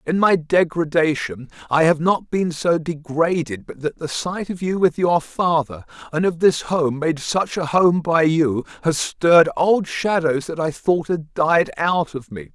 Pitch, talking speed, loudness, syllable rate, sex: 160 Hz, 190 wpm, -19 LUFS, 4.2 syllables/s, male